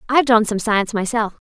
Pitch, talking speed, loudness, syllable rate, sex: 220 Hz, 205 wpm, -18 LUFS, 6.5 syllables/s, female